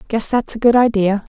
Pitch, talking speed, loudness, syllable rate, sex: 220 Hz, 265 wpm, -16 LUFS, 5.8 syllables/s, female